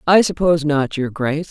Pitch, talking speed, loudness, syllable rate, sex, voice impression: 155 Hz, 200 wpm, -18 LUFS, 5.8 syllables/s, female, feminine, middle-aged, tensed, powerful, clear, fluent, intellectual, friendly, reassuring, elegant, lively, kind, slightly strict, slightly sharp